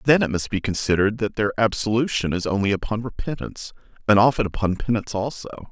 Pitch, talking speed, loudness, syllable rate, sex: 110 Hz, 180 wpm, -22 LUFS, 6.4 syllables/s, male